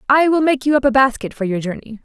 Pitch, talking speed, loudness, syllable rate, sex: 255 Hz, 295 wpm, -16 LUFS, 6.5 syllables/s, female